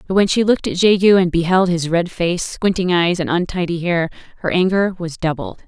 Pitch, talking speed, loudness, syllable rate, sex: 175 Hz, 210 wpm, -17 LUFS, 5.5 syllables/s, female